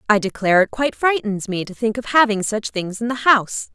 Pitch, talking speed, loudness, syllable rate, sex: 220 Hz, 240 wpm, -19 LUFS, 5.9 syllables/s, female